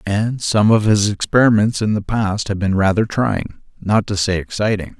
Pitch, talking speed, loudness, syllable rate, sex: 105 Hz, 190 wpm, -17 LUFS, 4.7 syllables/s, male